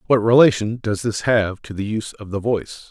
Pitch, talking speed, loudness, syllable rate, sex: 110 Hz, 225 wpm, -19 LUFS, 5.5 syllables/s, male